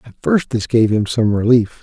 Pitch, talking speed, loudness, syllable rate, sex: 115 Hz, 230 wpm, -16 LUFS, 4.9 syllables/s, male